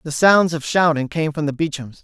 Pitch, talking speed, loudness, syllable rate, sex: 155 Hz, 235 wpm, -18 LUFS, 5.2 syllables/s, male